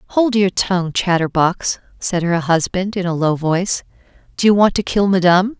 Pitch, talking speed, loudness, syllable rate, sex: 185 Hz, 180 wpm, -17 LUFS, 5.1 syllables/s, female